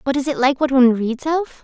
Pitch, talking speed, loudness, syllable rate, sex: 270 Hz, 295 wpm, -17 LUFS, 6.8 syllables/s, female